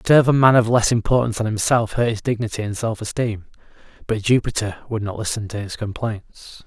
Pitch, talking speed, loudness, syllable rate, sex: 110 Hz, 205 wpm, -20 LUFS, 5.9 syllables/s, male